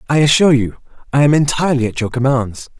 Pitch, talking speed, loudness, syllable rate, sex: 135 Hz, 195 wpm, -15 LUFS, 6.9 syllables/s, male